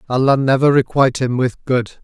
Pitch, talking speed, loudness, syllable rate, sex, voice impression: 130 Hz, 175 wpm, -16 LUFS, 5.4 syllables/s, male, very masculine, slightly old, very thick, tensed, very powerful, bright, slightly soft, clear, slightly fluent, slightly raspy, cool, very intellectual, refreshing, sincere, calm, mature, very friendly, very reassuring, unique, slightly elegant, very wild, slightly sweet, lively, slightly kind, slightly intense, slightly sharp